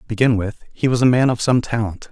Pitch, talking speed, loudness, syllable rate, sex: 115 Hz, 285 wpm, -18 LUFS, 6.9 syllables/s, male